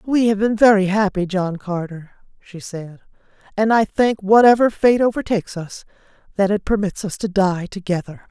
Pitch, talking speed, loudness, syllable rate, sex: 200 Hz, 165 wpm, -18 LUFS, 5.0 syllables/s, female